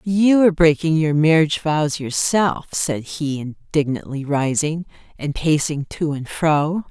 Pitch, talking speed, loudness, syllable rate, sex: 155 Hz, 140 wpm, -19 LUFS, 4.1 syllables/s, female